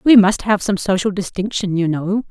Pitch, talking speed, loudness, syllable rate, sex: 195 Hz, 210 wpm, -17 LUFS, 5.1 syllables/s, female